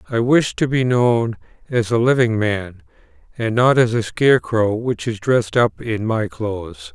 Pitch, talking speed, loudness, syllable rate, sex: 115 Hz, 180 wpm, -18 LUFS, 4.4 syllables/s, male